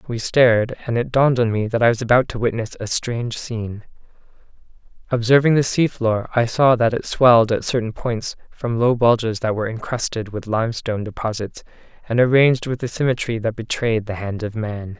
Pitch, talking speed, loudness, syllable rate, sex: 115 Hz, 190 wpm, -19 LUFS, 5.6 syllables/s, male